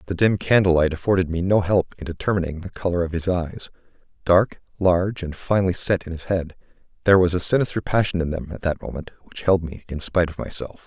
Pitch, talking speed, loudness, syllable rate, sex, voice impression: 90 Hz, 215 wpm, -22 LUFS, 6.2 syllables/s, male, very masculine, adult-like, thick, cool, sincere, slightly calm, sweet